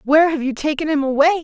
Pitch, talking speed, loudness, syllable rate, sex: 295 Hz, 250 wpm, -18 LUFS, 7.2 syllables/s, female